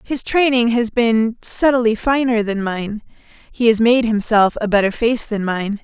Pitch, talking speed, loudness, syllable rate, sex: 225 Hz, 175 wpm, -17 LUFS, 4.3 syllables/s, female